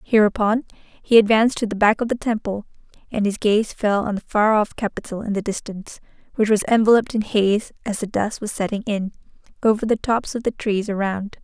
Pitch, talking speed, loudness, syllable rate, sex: 215 Hz, 205 wpm, -20 LUFS, 5.7 syllables/s, female